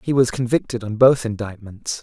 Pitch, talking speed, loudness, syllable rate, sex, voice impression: 115 Hz, 180 wpm, -19 LUFS, 5.2 syllables/s, male, masculine, adult-like, slightly relaxed, bright, slightly muffled, slightly refreshing, calm, slightly friendly, kind, modest